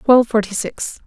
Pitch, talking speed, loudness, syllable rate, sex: 225 Hz, 170 wpm, -18 LUFS, 5.5 syllables/s, female